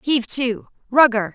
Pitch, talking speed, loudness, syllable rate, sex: 240 Hz, 135 wpm, -18 LUFS, 4.9 syllables/s, female